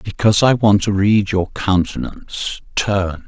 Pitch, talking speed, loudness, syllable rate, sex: 100 Hz, 130 wpm, -17 LUFS, 4.3 syllables/s, male